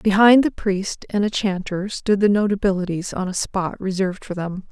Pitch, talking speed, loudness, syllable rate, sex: 195 Hz, 190 wpm, -20 LUFS, 5.0 syllables/s, female